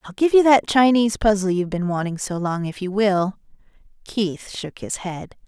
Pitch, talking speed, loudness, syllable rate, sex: 200 Hz, 195 wpm, -20 LUFS, 5.1 syllables/s, female